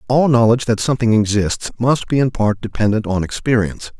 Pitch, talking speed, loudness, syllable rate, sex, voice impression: 115 Hz, 180 wpm, -17 LUFS, 5.9 syllables/s, male, masculine, middle-aged, tensed, powerful, hard, fluent, raspy, cool, calm, mature, reassuring, wild, strict